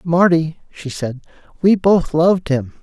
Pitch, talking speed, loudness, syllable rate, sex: 160 Hz, 150 wpm, -16 LUFS, 4.1 syllables/s, male